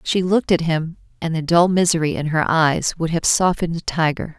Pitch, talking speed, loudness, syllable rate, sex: 165 Hz, 220 wpm, -19 LUFS, 5.5 syllables/s, female